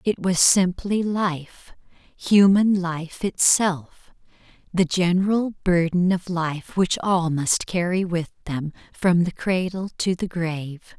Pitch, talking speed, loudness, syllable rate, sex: 180 Hz, 130 wpm, -21 LUFS, 3.5 syllables/s, female